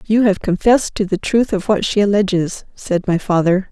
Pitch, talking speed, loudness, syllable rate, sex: 195 Hz, 210 wpm, -16 LUFS, 5.2 syllables/s, female